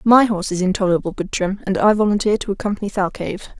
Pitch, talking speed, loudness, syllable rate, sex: 200 Hz, 215 wpm, -19 LUFS, 7.3 syllables/s, female